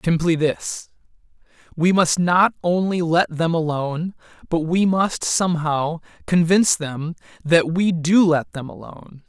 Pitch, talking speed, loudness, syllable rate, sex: 170 Hz, 135 wpm, -19 LUFS, 4.2 syllables/s, male